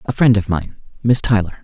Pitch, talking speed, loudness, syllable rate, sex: 105 Hz, 185 wpm, -17 LUFS, 5.5 syllables/s, male